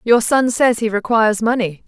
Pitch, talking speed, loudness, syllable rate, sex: 225 Hz, 190 wpm, -16 LUFS, 5.1 syllables/s, female